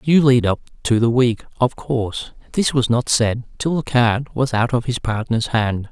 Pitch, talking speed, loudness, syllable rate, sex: 120 Hz, 215 wpm, -19 LUFS, 4.6 syllables/s, male